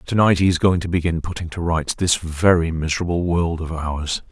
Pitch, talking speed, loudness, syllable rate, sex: 85 Hz, 210 wpm, -20 LUFS, 5.3 syllables/s, male